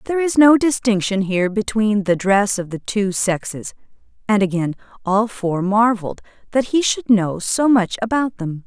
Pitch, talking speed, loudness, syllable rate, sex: 210 Hz, 175 wpm, -18 LUFS, 4.8 syllables/s, female